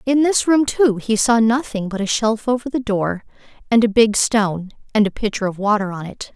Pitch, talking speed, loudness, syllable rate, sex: 220 Hz, 225 wpm, -18 LUFS, 5.2 syllables/s, female